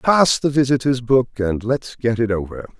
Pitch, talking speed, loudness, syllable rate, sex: 125 Hz, 195 wpm, -19 LUFS, 4.6 syllables/s, male